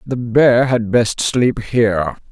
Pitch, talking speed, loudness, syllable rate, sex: 115 Hz, 155 wpm, -15 LUFS, 3.5 syllables/s, male